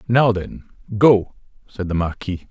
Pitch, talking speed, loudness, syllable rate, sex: 105 Hz, 145 wpm, -19 LUFS, 4.3 syllables/s, male